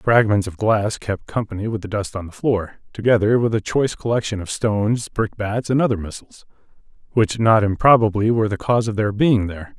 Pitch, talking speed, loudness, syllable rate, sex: 105 Hz, 190 wpm, -19 LUFS, 5.7 syllables/s, male